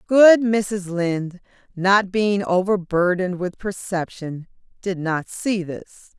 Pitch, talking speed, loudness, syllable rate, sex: 190 Hz, 115 wpm, -20 LUFS, 3.8 syllables/s, female